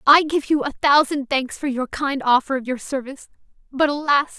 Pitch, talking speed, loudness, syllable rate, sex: 275 Hz, 205 wpm, -20 LUFS, 5.2 syllables/s, female